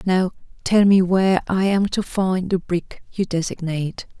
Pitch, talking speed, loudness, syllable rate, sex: 185 Hz, 170 wpm, -20 LUFS, 4.5 syllables/s, female